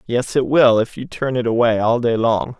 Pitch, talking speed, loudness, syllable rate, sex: 120 Hz, 255 wpm, -17 LUFS, 4.9 syllables/s, male